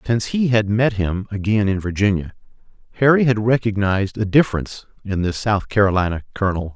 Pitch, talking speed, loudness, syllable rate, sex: 105 Hz, 160 wpm, -19 LUFS, 6.0 syllables/s, male